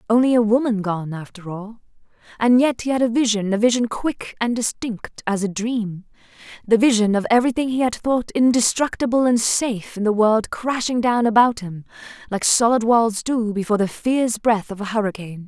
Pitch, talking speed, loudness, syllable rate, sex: 225 Hz, 185 wpm, -19 LUFS, 5.4 syllables/s, female